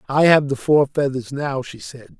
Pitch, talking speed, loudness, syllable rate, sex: 140 Hz, 220 wpm, -18 LUFS, 4.5 syllables/s, male